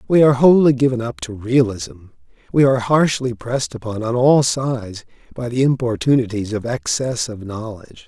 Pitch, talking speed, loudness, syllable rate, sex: 120 Hz, 165 wpm, -18 LUFS, 5.4 syllables/s, male